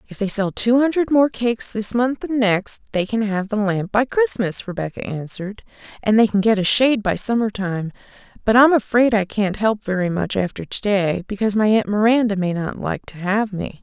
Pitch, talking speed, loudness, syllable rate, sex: 210 Hz, 215 wpm, -19 LUFS, 5.2 syllables/s, female